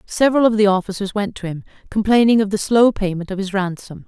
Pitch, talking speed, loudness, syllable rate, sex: 205 Hz, 220 wpm, -18 LUFS, 6.2 syllables/s, female